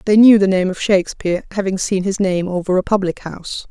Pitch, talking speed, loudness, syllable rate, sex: 190 Hz, 225 wpm, -16 LUFS, 6.1 syllables/s, female